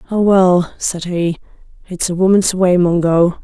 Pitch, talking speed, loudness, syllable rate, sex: 180 Hz, 155 wpm, -14 LUFS, 4.1 syllables/s, female